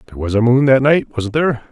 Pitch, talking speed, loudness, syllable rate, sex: 125 Hz, 280 wpm, -15 LUFS, 7.1 syllables/s, male